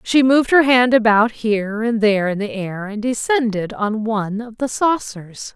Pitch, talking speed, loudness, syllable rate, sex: 225 Hz, 195 wpm, -17 LUFS, 4.8 syllables/s, female